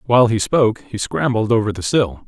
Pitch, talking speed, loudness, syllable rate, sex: 115 Hz, 210 wpm, -18 LUFS, 5.8 syllables/s, male